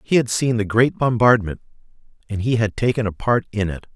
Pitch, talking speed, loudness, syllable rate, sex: 110 Hz, 210 wpm, -19 LUFS, 5.5 syllables/s, male